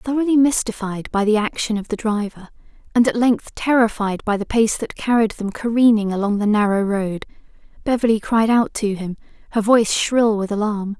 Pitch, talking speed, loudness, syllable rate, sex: 220 Hz, 180 wpm, -19 LUFS, 5.2 syllables/s, female